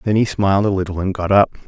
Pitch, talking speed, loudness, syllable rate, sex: 100 Hz, 285 wpm, -17 LUFS, 7.0 syllables/s, male